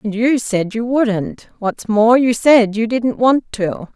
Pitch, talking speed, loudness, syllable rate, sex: 230 Hz, 195 wpm, -16 LUFS, 3.5 syllables/s, female